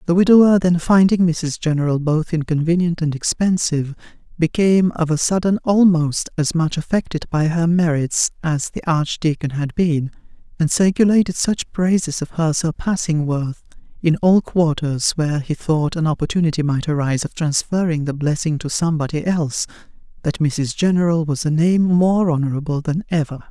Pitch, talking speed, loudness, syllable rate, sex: 160 Hz, 155 wpm, -18 LUFS, 5.1 syllables/s, female